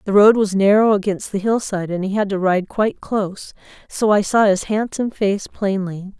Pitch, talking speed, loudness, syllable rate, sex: 200 Hz, 205 wpm, -18 LUFS, 5.3 syllables/s, female